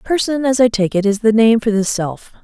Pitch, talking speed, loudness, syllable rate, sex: 220 Hz, 270 wpm, -15 LUFS, 5.3 syllables/s, female